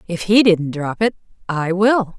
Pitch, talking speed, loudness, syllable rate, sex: 185 Hz, 190 wpm, -17 LUFS, 4.1 syllables/s, female